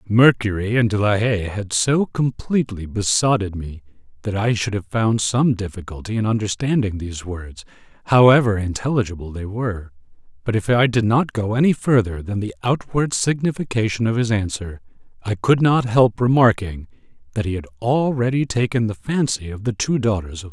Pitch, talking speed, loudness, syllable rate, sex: 110 Hz, 175 wpm, -20 LUFS, 5.4 syllables/s, male